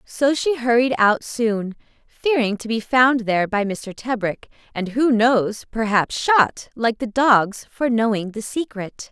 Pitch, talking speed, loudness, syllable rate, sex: 230 Hz, 165 wpm, -20 LUFS, 3.9 syllables/s, female